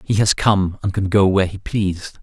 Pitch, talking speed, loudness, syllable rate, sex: 95 Hz, 245 wpm, -18 LUFS, 5.0 syllables/s, male